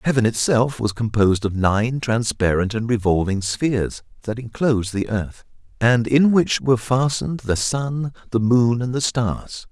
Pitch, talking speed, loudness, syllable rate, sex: 115 Hz, 160 wpm, -20 LUFS, 4.6 syllables/s, male